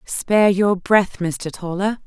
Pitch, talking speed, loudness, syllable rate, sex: 195 Hz, 145 wpm, -19 LUFS, 3.7 syllables/s, female